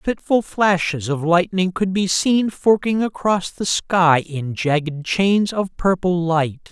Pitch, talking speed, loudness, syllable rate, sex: 180 Hz, 150 wpm, -19 LUFS, 3.6 syllables/s, male